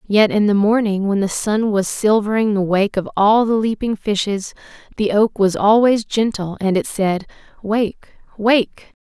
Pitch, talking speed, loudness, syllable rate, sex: 210 Hz, 175 wpm, -17 LUFS, 4.4 syllables/s, female